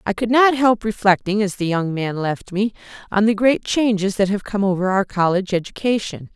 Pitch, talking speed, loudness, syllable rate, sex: 205 Hz, 210 wpm, -19 LUFS, 5.3 syllables/s, female